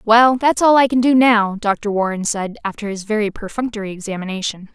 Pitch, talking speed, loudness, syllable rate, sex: 215 Hz, 190 wpm, -17 LUFS, 5.5 syllables/s, female